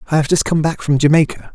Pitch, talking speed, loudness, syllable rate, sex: 150 Hz, 270 wpm, -15 LUFS, 6.8 syllables/s, male